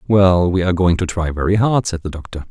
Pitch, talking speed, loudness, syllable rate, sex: 90 Hz, 265 wpm, -17 LUFS, 6.0 syllables/s, male